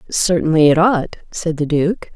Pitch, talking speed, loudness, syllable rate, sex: 165 Hz, 165 wpm, -16 LUFS, 4.4 syllables/s, female